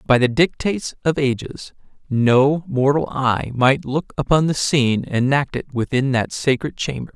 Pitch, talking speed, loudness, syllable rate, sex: 135 Hz, 150 wpm, -19 LUFS, 4.5 syllables/s, male